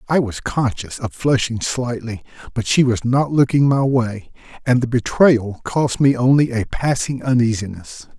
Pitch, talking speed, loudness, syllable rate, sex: 120 Hz, 160 wpm, -18 LUFS, 4.4 syllables/s, male